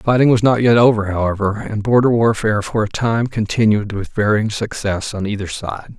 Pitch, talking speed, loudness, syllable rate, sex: 110 Hz, 190 wpm, -17 LUFS, 5.2 syllables/s, male